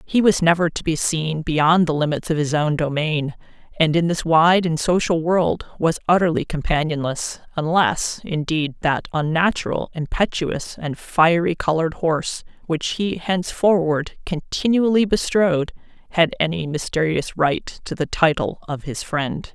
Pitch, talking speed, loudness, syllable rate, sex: 165 Hz, 140 wpm, -20 LUFS, 4.5 syllables/s, female